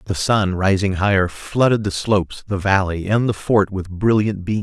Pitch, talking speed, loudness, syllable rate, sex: 100 Hz, 195 wpm, -18 LUFS, 4.7 syllables/s, male